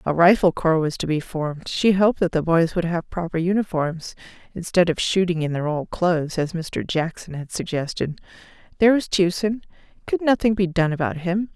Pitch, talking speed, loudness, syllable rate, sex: 175 Hz, 190 wpm, -21 LUFS, 5.3 syllables/s, female